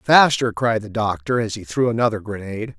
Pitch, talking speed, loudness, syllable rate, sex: 115 Hz, 195 wpm, -20 LUFS, 5.5 syllables/s, male